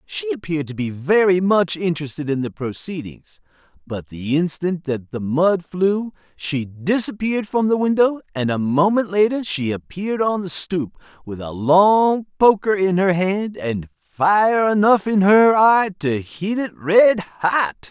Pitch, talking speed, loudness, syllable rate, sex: 175 Hz, 165 wpm, -19 LUFS, 4.2 syllables/s, male